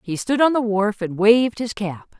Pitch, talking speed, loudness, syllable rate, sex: 215 Hz, 245 wpm, -19 LUFS, 4.8 syllables/s, female